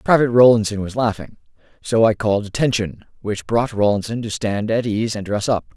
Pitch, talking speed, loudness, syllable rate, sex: 110 Hz, 190 wpm, -19 LUFS, 5.7 syllables/s, male